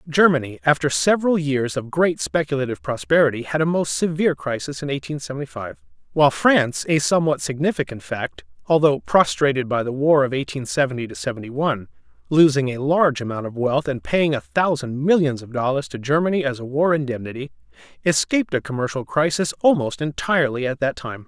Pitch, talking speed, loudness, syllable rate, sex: 140 Hz, 175 wpm, -21 LUFS, 5.7 syllables/s, male